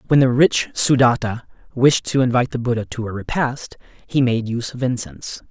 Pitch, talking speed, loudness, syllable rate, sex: 120 Hz, 185 wpm, -19 LUFS, 5.6 syllables/s, male